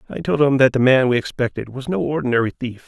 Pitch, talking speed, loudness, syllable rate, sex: 130 Hz, 250 wpm, -18 LUFS, 6.5 syllables/s, male